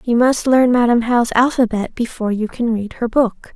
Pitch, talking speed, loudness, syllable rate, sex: 235 Hz, 205 wpm, -16 LUFS, 5.0 syllables/s, female